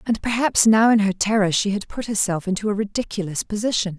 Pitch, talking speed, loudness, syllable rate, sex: 205 Hz, 210 wpm, -20 LUFS, 5.9 syllables/s, female